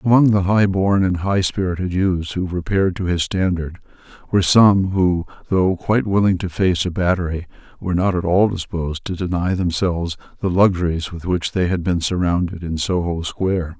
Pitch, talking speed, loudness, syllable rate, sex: 90 Hz, 185 wpm, -19 LUFS, 5.3 syllables/s, male